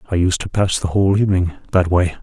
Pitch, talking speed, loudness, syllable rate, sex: 90 Hz, 245 wpm, -17 LUFS, 6.3 syllables/s, male